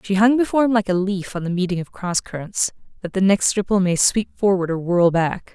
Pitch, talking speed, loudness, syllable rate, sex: 190 Hz, 250 wpm, -20 LUFS, 5.6 syllables/s, female